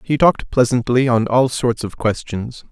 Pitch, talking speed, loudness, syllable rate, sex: 120 Hz, 175 wpm, -17 LUFS, 4.7 syllables/s, male